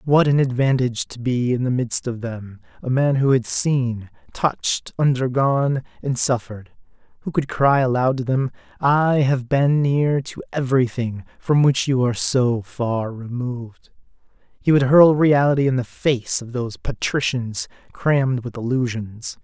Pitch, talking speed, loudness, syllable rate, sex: 130 Hz, 155 wpm, -20 LUFS, 4.5 syllables/s, male